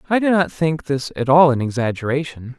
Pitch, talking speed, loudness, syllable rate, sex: 145 Hz, 210 wpm, -18 LUFS, 5.4 syllables/s, male